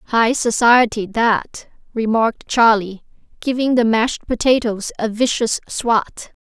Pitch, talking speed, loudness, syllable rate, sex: 230 Hz, 110 wpm, -17 LUFS, 3.9 syllables/s, female